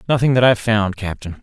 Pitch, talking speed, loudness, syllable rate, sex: 110 Hz, 210 wpm, -17 LUFS, 6.4 syllables/s, male